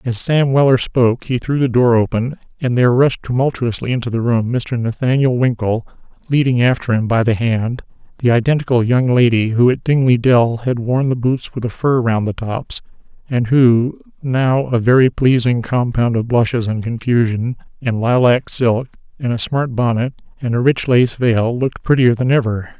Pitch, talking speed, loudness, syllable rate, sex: 120 Hz, 185 wpm, -16 LUFS, 4.9 syllables/s, male